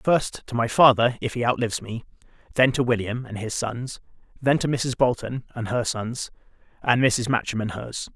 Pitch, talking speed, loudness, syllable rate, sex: 120 Hz, 190 wpm, -23 LUFS, 5.0 syllables/s, male